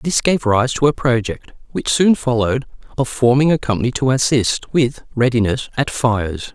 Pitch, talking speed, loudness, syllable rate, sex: 125 Hz, 175 wpm, -17 LUFS, 5.0 syllables/s, male